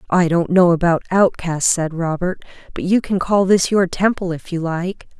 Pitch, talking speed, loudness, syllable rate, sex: 175 Hz, 195 wpm, -17 LUFS, 4.6 syllables/s, female